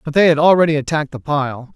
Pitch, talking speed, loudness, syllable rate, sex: 150 Hz, 240 wpm, -16 LUFS, 6.8 syllables/s, male